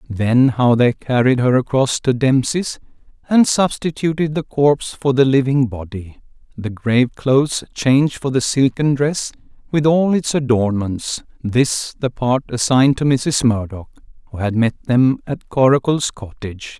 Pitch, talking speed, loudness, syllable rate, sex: 130 Hz, 145 wpm, -17 LUFS, 4.4 syllables/s, male